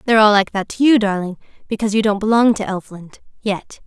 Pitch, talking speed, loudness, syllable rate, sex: 210 Hz, 200 wpm, -17 LUFS, 6.2 syllables/s, female